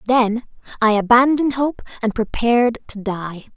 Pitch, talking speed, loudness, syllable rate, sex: 235 Hz, 135 wpm, -18 LUFS, 4.8 syllables/s, female